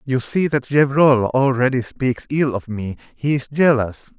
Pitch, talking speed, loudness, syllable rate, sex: 130 Hz, 170 wpm, -18 LUFS, 4.1 syllables/s, male